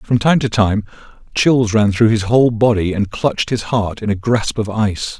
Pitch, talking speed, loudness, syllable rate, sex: 110 Hz, 220 wpm, -16 LUFS, 4.9 syllables/s, male